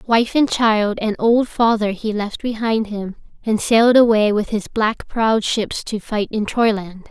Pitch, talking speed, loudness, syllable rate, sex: 220 Hz, 185 wpm, -18 LUFS, 4.2 syllables/s, female